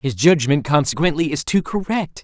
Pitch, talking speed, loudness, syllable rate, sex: 155 Hz, 160 wpm, -18 LUFS, 5.0 syllables/s, male